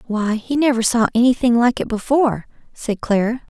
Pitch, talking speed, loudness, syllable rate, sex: 235 Hz, 185 wpm, -18 LUFS, 5.4 syllables/s, female